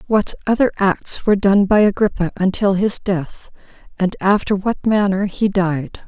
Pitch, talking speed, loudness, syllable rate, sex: 195 Hz, 160 wpm, -17 LUFS, 4.5 syllables/s, female